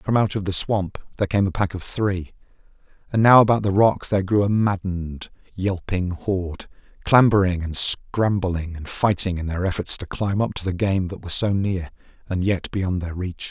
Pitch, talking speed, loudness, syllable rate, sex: 95 Hz, 200 wpm, -21 LUFS, 4.9 syllables/s, male